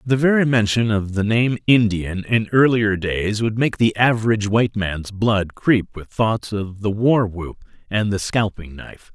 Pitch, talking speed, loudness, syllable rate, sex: 105 Hz, 185 wpm, -19 LUFS, 4.4 syllables/s, male